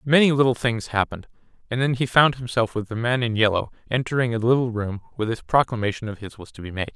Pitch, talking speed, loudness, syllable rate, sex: 115 Hz, 235 wpm, -22 LUFS, 6.5 syllables/s, male